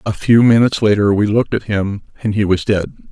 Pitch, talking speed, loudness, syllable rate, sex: 105 Hz, 230 wpm, -15 LUFS, 6.2 syllables/s, male